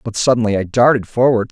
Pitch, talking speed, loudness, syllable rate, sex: 115 Hz, 200 wpm, -15 LUFS, 6.2 syllables/s, male